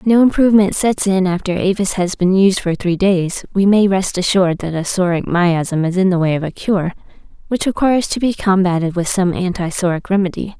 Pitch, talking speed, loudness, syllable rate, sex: 190 Hz, 215 wpm, -16 LUFS, 5.5 syllables/s, female